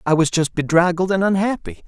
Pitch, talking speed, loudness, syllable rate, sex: 175 Hz, 190 wpm, -18 LUFS, 5.7 syllables/s, male